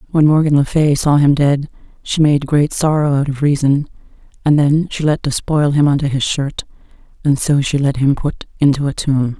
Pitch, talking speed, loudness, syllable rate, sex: 145 Hz, 205 wpm, -15 LUFS, 5.0 syllables/s, female